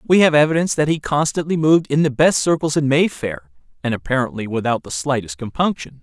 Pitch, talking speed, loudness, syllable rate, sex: 145 Hz, 190 wpm, -18 LUFS, 6.2 syllables/s, male